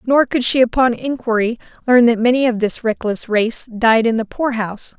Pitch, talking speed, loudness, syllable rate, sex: 235 Hz, 190 wpm, -16 LUFS, 5.1 syllables/s, female